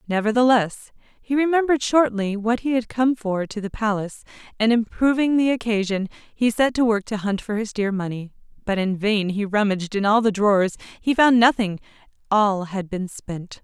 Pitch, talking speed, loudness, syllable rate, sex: 220 Hz, 185 wpm, -21 LUFS, 5.2 syllables/s, female